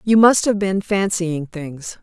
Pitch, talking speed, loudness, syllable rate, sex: 185 Hz, 180 wpm, -18 LUFS, 3.7 syllables/s, female